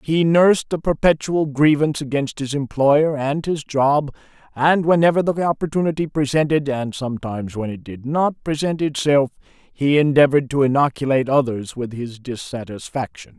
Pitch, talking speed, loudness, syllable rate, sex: 140 Hz, 145 wpm, -19 LUFS, 5.1 syllables/s, male